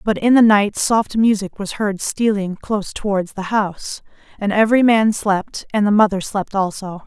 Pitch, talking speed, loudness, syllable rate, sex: 205 Hz, 185 wpm, -17 LUFS, 4.8 syllables/s, female